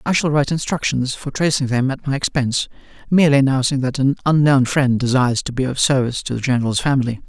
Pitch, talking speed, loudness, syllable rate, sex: 135 Hz, 200 wpm, -18 LUFS, 6.7 syllables/s, male